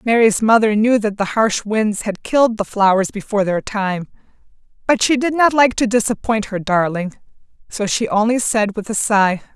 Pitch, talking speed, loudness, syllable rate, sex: 215 Hz, 190 wpm, -17 LUFS, 4.9 syllables/s, female